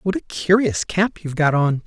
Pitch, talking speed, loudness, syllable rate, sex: 170 Hz, 225 wpm, -19 LUFS, 5.0 syllables/s, male